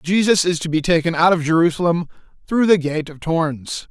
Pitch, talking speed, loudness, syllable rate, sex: 165 Hz, 200 wpm, -18 LUFS, 5.6 syllables/s, male